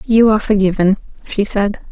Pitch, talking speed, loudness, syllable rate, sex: 205 Hz, 155 wpm, -15 LUFS, 5.5 syllables/s, female